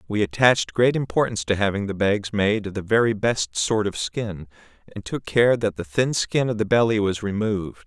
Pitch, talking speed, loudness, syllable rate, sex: 105 Hz, 215 wpm, -22 LUFS, 5.2 syllables/s, male